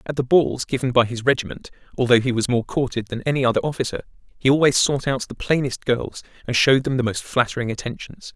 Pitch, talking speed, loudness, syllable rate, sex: 125 Hz, 215 wpm, -21 LUFS, 6.2 syllables/s, male